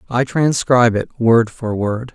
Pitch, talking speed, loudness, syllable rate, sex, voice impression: 120 Hz, 170 wpm, -16 LUFS, 4.3 syllables/s, male, very masculine, very adult-like, middle-aged, thick, slightly tensed, slightly powerful, slightly dark, hard, slightly muffled, slightly fluent, slightly raspy, cool, slightly intellectual, sincere, calm, mature, friendly, reassuring, slightly unique, wild, slightly sweet, kind, very modest